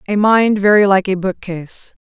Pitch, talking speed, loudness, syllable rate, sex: 195 Hz, 175 wpm, -13 LUFS, 5.0 syllables/s, female